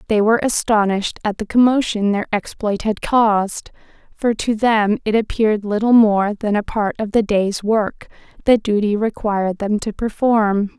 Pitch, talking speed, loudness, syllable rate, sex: 215 Hz, 165 wpm, -18 LUFS, 4.7 syllables/s, female